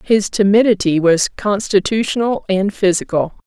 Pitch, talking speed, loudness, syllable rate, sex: 200 Hz, 105 wpm, -15 LUFS, 4.7 syllables/s, female